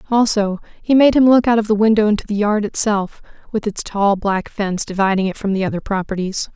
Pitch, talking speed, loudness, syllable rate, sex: 210 Hz, 220 wpm, -17 LUFS, 5.9 syllables/s, female